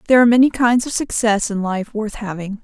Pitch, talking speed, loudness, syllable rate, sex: 220 Hz, 230 wpm, -17 LUFS, 6.1 syllables/s, female